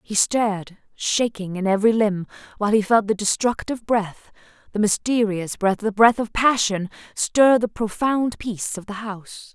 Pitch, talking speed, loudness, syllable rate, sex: 215 Hz, 165 wpm, -21 LUFS, 4.8 syllables/s, female